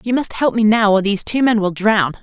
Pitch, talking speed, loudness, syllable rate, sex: 215 Hz, 295 wpm, -16 LUFS, 5.9 syllables/s, female